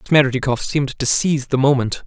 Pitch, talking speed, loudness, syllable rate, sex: 135 Hz, 175 wpm, -18 LUFS, 5.6 syllables/s, male